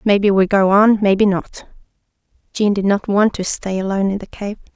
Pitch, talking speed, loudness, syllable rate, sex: 200 Hz, 200 wpm, -16 LUFS, 5.5 syllables/s, female